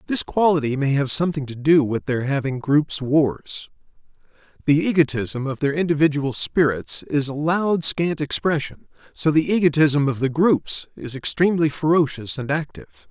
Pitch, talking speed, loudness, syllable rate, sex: 145 Hz, 150 wpm, -20 LUFS, 5.1 syllables/s, male